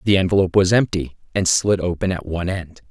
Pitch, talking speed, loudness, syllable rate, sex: 90 Hz, 205 wpm, -19 LUFS, 6.3 syllables/s, male